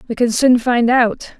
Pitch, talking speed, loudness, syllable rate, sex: 240 Hz, 215 wpm, -15 LUFS, 4.1 syllables/s, female